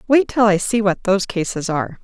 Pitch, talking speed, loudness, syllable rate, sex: 195 Hz, 235 wpm, -18 LUFS, 5.9 syllables/s, female